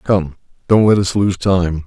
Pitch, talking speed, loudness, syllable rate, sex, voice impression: 95 Hz, 195 wpm, -15 LUFS, 4.1 syllables/s, male, very masculine, very adult-like, slightly old, very thick, slightly tensed, powerful, slightly bright, hard, very clear, fluent, raspy, very cool, very intellectual, sincere, very calm, very mature, friendly, reassuring, very unique, very wild, slightly lively, kind, slightly modest